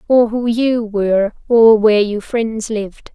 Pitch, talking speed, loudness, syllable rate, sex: 220 Hz, 170 wpm, -15 LUFS, 4.2 syllables/s, female